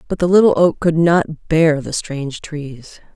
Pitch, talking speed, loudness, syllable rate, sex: 160 Hz, 190 wpm, -16 LUFS, 4.2 syllables/s, female